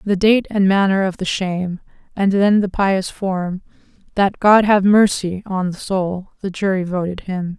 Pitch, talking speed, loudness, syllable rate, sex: 190 Hz, 180 wpm, -18 LUFS, 4.3 syllables/s, female